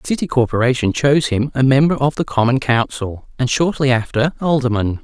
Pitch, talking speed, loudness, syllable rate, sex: 130 Hz, 180 wpm, -17 LUFS, 5.6 syllables/s, male